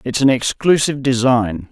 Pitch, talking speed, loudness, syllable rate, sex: 125 Hz, 140 wpm, -16 LUFS, 5.0 syllables/s, male